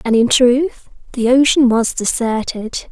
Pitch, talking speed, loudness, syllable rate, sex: 245 Hz, 145 wpm, -15 LUFS, 3.9 syllables/s, female